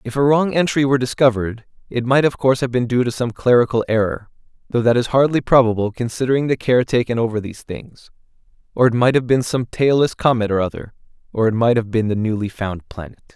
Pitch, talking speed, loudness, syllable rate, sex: 120 Hz, 215 wpm, -18 LUFS, 6.2 syllables/s, male